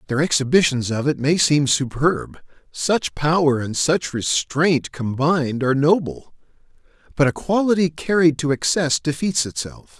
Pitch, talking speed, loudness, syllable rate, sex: 150 Hz, 125 wpm, -19 LUFS, 4.5 syllables/s, male